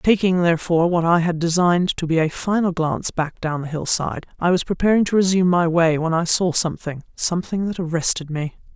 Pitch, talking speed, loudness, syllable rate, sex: 170 Hz, 200 wpm, -20 LUFS, 6.0 syllables/s, female